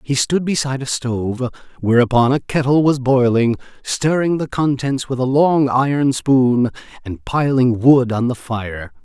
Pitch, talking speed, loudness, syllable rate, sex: 130 Hz, 145 wpm, -17 LUFS, 4.4 syllables/s, male